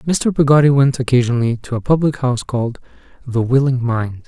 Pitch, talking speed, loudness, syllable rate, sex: 130 Hz, 170 wpm, -16 LUFS, 5.8 syllables/s, male